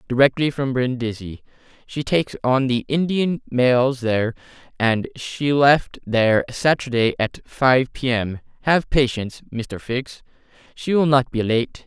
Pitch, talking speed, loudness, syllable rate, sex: 130 Hz, 135 wpm, -20 LUFS, 4.2 syllables/s, male